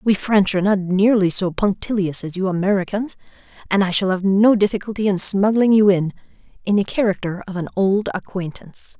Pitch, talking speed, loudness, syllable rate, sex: 195 Hz, 180 wpm, -18 LUFS, 5.6 syllables/s, female